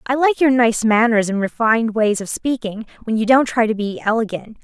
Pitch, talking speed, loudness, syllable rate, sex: 230 Hz, 220 wpm, -17 LUFS, 5.4 syllables/s, female